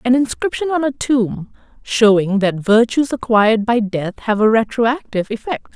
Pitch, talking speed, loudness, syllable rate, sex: 230 Hz, 155 wpm, -16 LUFS, 4.7 syllables/s, female